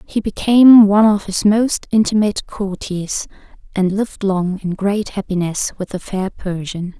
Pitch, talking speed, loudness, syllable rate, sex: 200 Hz, 155 wpm, -16 LUFS, 4.6 syllables/s, female